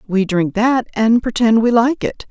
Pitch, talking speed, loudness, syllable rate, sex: 225 Hz, 210 wpm, -15 LUFS, 4.3 syllables/s, female